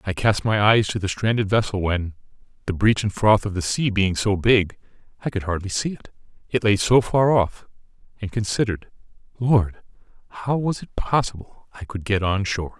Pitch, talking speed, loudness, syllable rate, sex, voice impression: 105 Hz, 190 wpm, -21 LUFS, 5.2 syllables/s, male, masculine, adult-like, slightly thick, sincere, slightly friendly, slightly wild